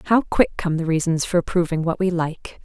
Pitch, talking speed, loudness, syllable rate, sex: 170 Hz, 225 wpm, -21 LUFS, 5.7 syllables/s, female